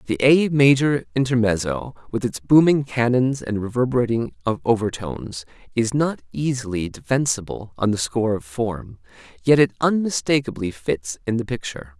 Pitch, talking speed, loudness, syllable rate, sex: 115 Hz, 135 wpm, -21 LUFS, 5.0 syllables/s, male